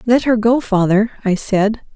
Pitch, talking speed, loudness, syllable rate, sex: 215 Hz, 185 wpm, -16 LUFS, 4.4 syllables/s, female